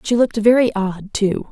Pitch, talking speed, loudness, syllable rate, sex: 215 Hz, 200 wpm, -17 LUFS, 5.0 syllables/s, female